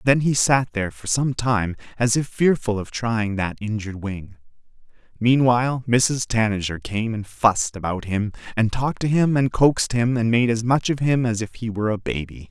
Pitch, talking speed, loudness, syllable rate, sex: 115 Hz, 200 wpm, -21 LUFS, 5.2 syllables/s, male